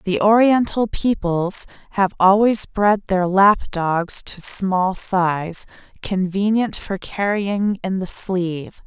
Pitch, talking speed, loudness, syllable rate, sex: 195 Hz, 120 wpm, -19 LUFS, 3.3 syllables/s, female